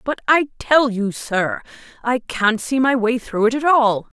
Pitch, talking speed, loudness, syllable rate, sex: 240 Hz, 200 wpm, -18 LUFS, 4.1 syllables/s, female